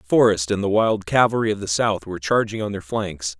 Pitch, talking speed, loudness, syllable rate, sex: 100 Hz, 230 wpm, -21 LUFS, 5.5 syllables/s, male